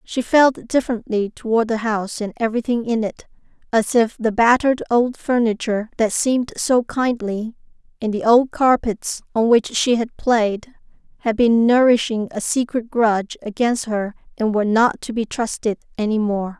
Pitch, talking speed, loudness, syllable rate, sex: 230 Hz, 165 wpm, -19 LUFS, 4.9 syllables/s, female